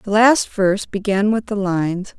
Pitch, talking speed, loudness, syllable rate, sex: 200 Hz, 190 wpm, -18 LUFS, 4.7 syllables/s, female